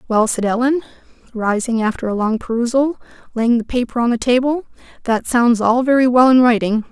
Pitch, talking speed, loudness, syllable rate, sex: 240 Hz, 180 wpm, -16 LUFS, 5.5 syllables/s, female